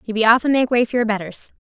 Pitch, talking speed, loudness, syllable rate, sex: 230 Hz, 330 wpm, -17 LUFS, 6.8 syllables/s, female